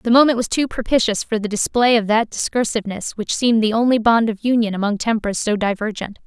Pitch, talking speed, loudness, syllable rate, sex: 225 Hz, 210 wpm, -18 LUFS, 6.0 syllables/s, female